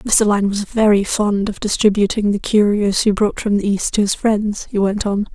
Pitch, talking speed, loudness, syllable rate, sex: 205 Hz, 225 wpm, -17 LUFS, 5.0 syllables/s, female